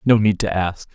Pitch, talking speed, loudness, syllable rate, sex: 100 Hz, 255 wpm, -19 LUFS, 4.9 syllables/s, male